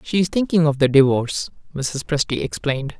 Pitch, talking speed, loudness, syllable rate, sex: 150 Hz, 180 wpm, -19 LUFS, 5.6 syllables/s, male